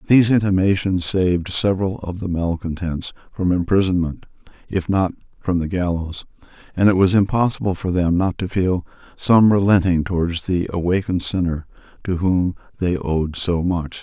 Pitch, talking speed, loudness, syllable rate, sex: 90 Hz, 150 wpm, -20 LUFS, 5.2 syllables/s, male